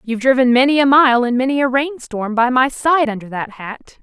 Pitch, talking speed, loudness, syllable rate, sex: 255 Hz, 225 wpm, -15 LUFS, 5.4 syllables/s, female